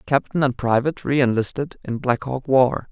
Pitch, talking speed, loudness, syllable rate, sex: 130 Hz, 185 wpm, -21 LUFS, 4.8 syllables/s, male